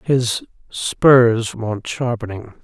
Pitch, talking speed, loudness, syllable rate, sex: 115 Hz, 90 wpm, -18 LUFS, 2.7 syllables/s, male